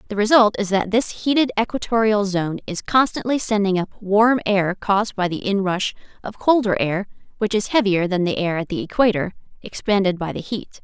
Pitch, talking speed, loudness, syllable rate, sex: 205 Hz, 190 wpm, -20 LUFS, 5.3 syllables/s, female